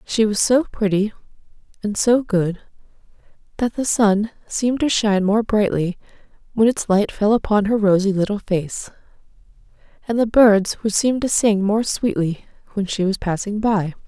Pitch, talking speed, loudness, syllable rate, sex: 210 Hz, 160 wpm, -19 LUFS, 4.7 syllables/s, female